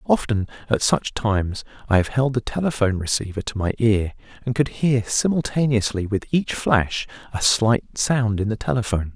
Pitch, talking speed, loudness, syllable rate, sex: 115 Hz, 170 wpm, -21 LUFS, 5.1 syllables/s, male